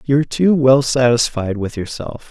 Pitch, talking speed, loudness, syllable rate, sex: 130 Hz, 155 wpm, -16 LUFS, 4.6 syllables/s, male